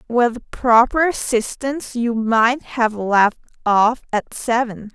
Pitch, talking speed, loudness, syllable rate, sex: 235 Hz, 120 wpm, -18 LUFS, 3.4 syllables/s, female